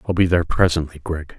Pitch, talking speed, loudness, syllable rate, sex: 85 Hz, 215 wpm, -20 LUFS, 6.8 syllables/s, male